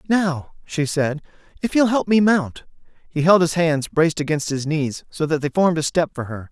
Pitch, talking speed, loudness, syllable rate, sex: 160 Hz, 220 wpm, -20 LUFS, 5.1 syllables/s, male